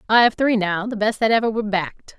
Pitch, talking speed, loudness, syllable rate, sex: 215 Hz, 275 wpm, -19 LUFS, 6.5 syllables/s, female